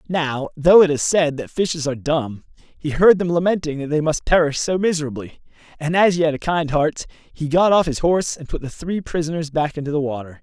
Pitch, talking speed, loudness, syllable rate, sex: 155 Hz, 230 wpm, -19 LUFS, 5.6 syllables/s, male